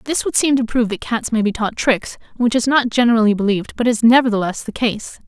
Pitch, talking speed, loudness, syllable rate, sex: 230 Hz, 240 wpm, -17 LUFS, 6.1 syllables/s, female